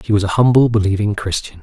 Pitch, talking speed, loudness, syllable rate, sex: 105 Hz, 220 wpm, -15 LUFS, 6.5 syllables/s, male